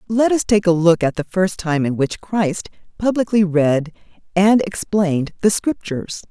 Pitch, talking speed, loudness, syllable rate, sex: 185 Hz, 170 wpm, -18 LUFS, 4.6 syllables/s, female